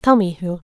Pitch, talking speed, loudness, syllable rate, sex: 195 Hz, 255 wpm, -19 LUFS, 5.2 syllables/s, female